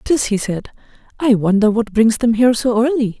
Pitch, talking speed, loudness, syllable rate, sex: 230 Hz, 225 wpm, -16 LUFS, 5.7 syllables/s, female